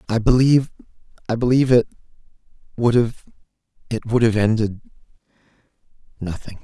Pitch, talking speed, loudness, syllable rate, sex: 115 Hz, 80 wpm, -19 LUFS, 6.1 syllables/s, male